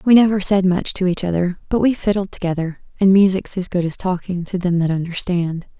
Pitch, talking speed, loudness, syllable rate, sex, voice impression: 185 Hz, 215 wpm, -18 LUFS, 5.6 syllables/s, female, feminine, slightly young, soft, slightly cute, calm, friendly, kind